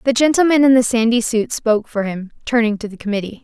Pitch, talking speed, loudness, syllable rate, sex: 230 Hz, 225 wpm, -16 LUFS, 6.3 syllables/s, female